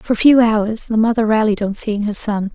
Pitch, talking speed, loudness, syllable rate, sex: 220 Hz, 260 wpm, -16 LUFS, 5.2 syllables/s, female